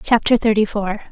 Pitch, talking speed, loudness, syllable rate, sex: 215 Hz, 160 wpm, -17 LUFS, 5.4 syllables/s, female